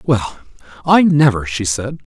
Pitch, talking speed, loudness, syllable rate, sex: 120 Hz, 145 wpm, -15 LUFS, 4.7 syllables/s, male